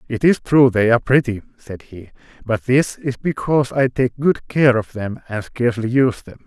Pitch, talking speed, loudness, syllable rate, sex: 120 Hz, 205 wpm, -18 LUFS, 5.1 syllables/s, male